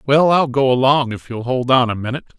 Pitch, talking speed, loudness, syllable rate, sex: 130 Hz, 250 wpm, -16 LUFS, 6.1 syllables/s, male